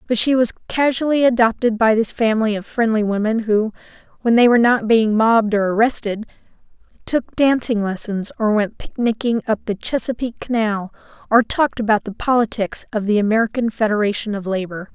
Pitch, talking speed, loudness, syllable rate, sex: 225 Hz, 165 wpm, -18 LUFS, 5.6 syllables/s, female